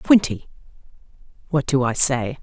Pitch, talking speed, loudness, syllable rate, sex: 135 Hz, 125 wpm, -19 LUFS, 4.4 syllables/s, female